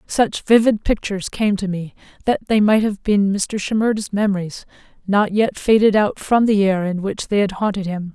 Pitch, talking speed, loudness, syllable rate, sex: 205 Hz, 200 wpm, -18 LUFS, 5.0 syllables/s, female